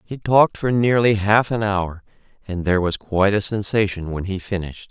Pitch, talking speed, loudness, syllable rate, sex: 100 Hz, 195 wpm, -20 LUFS, 5.5 syllables/s, male